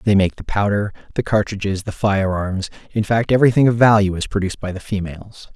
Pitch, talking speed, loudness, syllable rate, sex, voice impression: 100 Hz, 195 wpm, -18 LUFS, 6.0 syllables/s, male, very masculine, very adult-like, thick, tensed, slightly powerful, slightly dark, slightly soft, clear, fluent, cool, intellectual, slightly refreshing, sincere, calm, slightly mature, friendly, reassuring, slightly unique, elegant, slightly wild, sweet, lively, kind, slightly modest